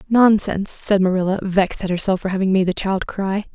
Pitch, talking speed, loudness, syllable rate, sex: 195 Hz, 205 wpm, -19 LUFS, 5.7 syllables/s, female